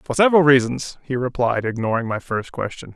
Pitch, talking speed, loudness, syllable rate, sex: 130 Hz, 185 wpm, -20 LUFS, 5.7 syllables/s, male